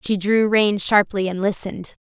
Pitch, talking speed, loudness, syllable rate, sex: 200 Hz, 180 wpm, -19 LUFS, 4.8 syllables/s, female